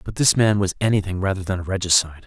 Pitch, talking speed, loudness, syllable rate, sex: 95 Hz, 240 wpm, -20 LUFS, 7.0 syllables/s, male